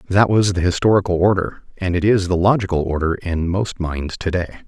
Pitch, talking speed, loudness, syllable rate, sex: 90 Hz, 205 wpm, -18 LUFS, 5.5 syllables/s, male